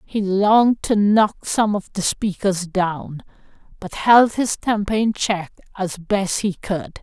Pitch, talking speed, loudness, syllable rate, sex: 200 Hz, 160 wpm, -19 LUFS, 3.6 syllables/s, female